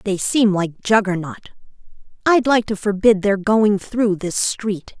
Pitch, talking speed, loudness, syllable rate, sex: 205 Hz, 155 wpm, -18 LUFS, 4.0 syllables/s, female